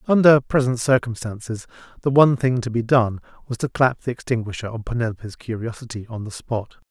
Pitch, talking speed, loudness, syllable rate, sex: 120 Hz, 175 wpm, -21 LUFS, 6.0 syllables/s, male